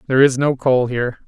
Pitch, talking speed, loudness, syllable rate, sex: 130 Hz, 235 wpm, -17 LUFS, 6.7 syllables/s, male